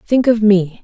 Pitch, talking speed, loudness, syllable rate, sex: 210 Hz, 215 wpm, -13 LUFS, 4.5 syllables/s, female